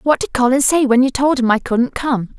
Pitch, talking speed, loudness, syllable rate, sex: 255 Hz, 275 wpm, -15 LUFS, 5.3 syllables/s, female